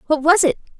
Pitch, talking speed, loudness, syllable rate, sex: 310 Hz, 225 wpm, -16 LUFS, 7.0 syllables/s, female